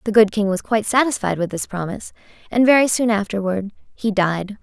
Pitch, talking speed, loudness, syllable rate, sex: 210 Hz, 195 wpm, -19 LUFS, 5.7 syllables/s, female